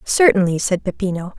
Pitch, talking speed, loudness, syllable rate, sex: 195 Hz, 130 wpm, -18 LUFS, 5.5 syllables/s, female